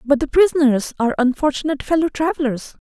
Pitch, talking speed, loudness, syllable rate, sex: 285 Hz, 145 wpm, -18 LUFS, 6.2 syllables/s, female